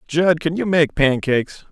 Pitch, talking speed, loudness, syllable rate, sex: 150 Hz, 175 wpm, -18 LUFS, 4.6 syllables/s, male